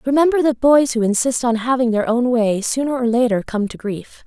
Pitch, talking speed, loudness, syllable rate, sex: 245 Hz, 225 wpm, -17 LUFS, 5.4 syllables/s, female